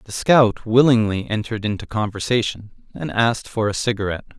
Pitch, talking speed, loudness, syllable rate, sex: 110 Hz, 150 wpm, -19 LUFS, 5.7 syllables/s, male